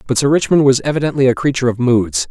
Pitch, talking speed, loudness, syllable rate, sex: 130 Hz, 235 wpm, -14 LUFS, 6.9 syllables/s, male